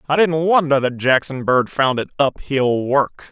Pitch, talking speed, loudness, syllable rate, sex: 140 Hz, 180 wpm, -17 LUFS, 4.3 syllables/s, male